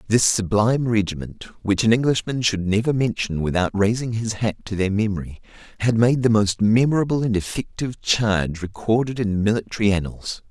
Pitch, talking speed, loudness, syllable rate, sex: 110 Hz, 160 wpm, -21 LUFS, 5.5 syllables/s, male